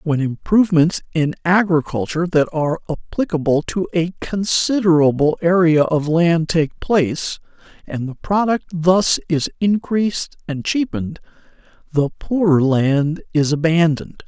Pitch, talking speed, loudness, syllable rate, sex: 165 Hz, 120 wpm, -18 LUFS, 4.5 syllables/s, male